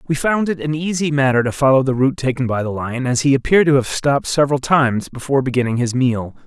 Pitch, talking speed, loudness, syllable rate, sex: 135 Hz, 240 wpm, -17 LUFS, 6.6 syllables/s, male